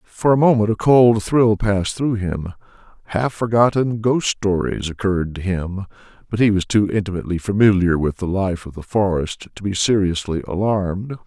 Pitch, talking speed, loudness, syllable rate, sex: 100 Hz, 170 wpm, -19 LUFS, 5.0 syllables/s, male